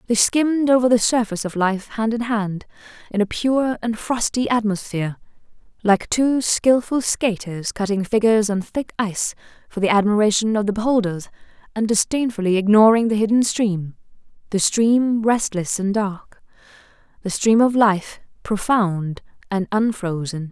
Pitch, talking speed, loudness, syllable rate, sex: 215 Hz, 140 wpm, -19 LUFS, 4.7 syllables/s, female